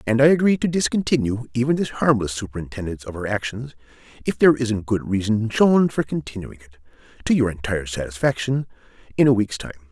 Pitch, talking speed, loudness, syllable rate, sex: 115 Hz, 175 wpm, -21 LUFS, 6.3 syllables/s, male